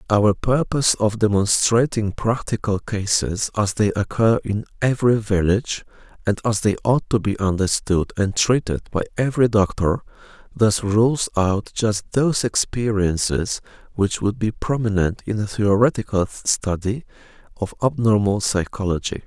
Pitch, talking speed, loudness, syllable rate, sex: 105 Hz, 130 wpm, -20 LUFS, 4.7 syllables/s, male